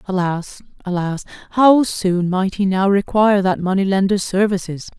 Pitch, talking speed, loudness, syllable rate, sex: 190 Hz, 145 wpm, -17 LUFS, 4.7 syllables/s, female